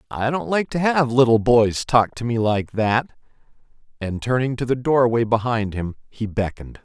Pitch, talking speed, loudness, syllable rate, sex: 120 Hz, 185 wpm, -20 LUFS, 4.8 syllables/s, male